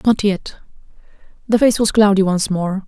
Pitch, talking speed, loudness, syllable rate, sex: 200 Hz, 165 wpm, -16 LUFS, 4.8 syllables/s, female